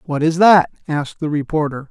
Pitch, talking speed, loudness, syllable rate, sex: 155 Hz, 190 wpm, -16 LUFS, 5.6 syllables/s, male